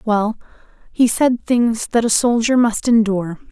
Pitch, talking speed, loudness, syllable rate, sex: 225 Hz, 155 wpm, -16 LUFS, 4.3 syllables/s, female